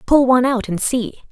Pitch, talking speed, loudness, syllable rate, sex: 245 Hz, 230 wpm, -17 LUFS, 5.7 syllables/s, female